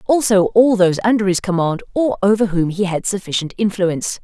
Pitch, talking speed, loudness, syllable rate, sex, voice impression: 200 Hz, 185 wpm, -17 LUFS, 5.6 syllables/s, female, very feminine, slightly middle-aged, thin, very tensed, powerful, very bright, soft, very clear, very fluent, slightly cute, cool, very intellectual, very refreshing, sincere, slightly calm, very friendly, very reassuring, unique, elegant, wild, slightly sweet, very lively, very kind, slightly intense, slightly light